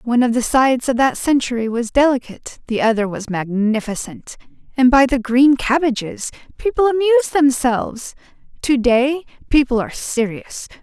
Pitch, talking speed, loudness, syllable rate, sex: 255 Hz, 145 wpm, -17 LUFS, 5.4 syllables/s, female